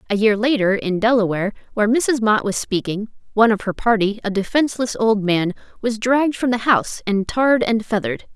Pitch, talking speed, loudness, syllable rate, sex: 220 Hz, 195 wpm, -19 LUFS, 5.9 syllables/s, female